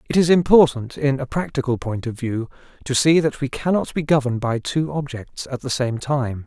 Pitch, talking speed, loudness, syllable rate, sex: 135 Hz, 215 wpm, -20 LUFS, 5.1 syllables/s, male